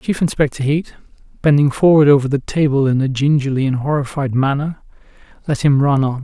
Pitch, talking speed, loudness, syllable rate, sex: 140 Hz, 175 wpm, -16 LUFS, 5.7 syllables/s, male